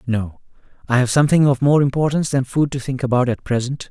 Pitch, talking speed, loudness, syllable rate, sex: 130 Hz, 215 wpm, -18 LUFS, 6.4 syllables/s, male